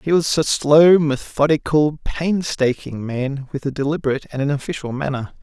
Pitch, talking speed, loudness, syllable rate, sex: 145 Hz, 155 wpm, -19 LUFS, 5.0 syllables/s, male